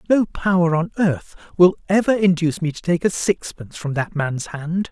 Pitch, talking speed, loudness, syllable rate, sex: 170 Hz, 195 wpm, -20 LUFS, 5.1 syllables/s, male